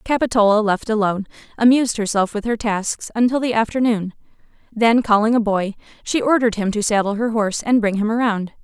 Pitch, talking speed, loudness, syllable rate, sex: 220 Hz, 180 wpm, -18 LUFS, 5.9 syllables/s, female